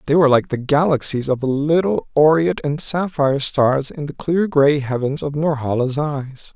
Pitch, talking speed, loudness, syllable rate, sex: 145 Hz, 175 wpm, -18 LUFS, 4.7 syllables/s, male